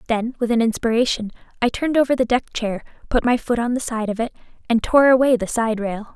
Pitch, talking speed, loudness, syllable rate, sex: 235 Hz, 235 wpm, -20 LUFS, 6.1 syllables/s, female